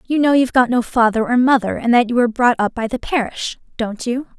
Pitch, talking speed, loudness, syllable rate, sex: 240 Hz, 260 wpm, -17 LUFS, 6.1 syllables/s, female